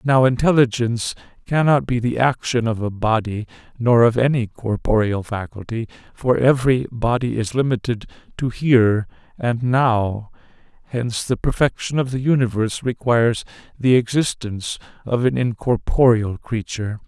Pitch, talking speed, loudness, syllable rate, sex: 120 Hz, 125 wpm, -20 LUFS, 4.9 syllables/s, male